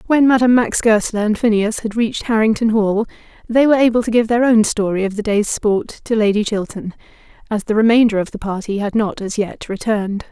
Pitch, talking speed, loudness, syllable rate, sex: 220 Hz, 210 wpm, -16 LUFS, 5.8 syllables/s, female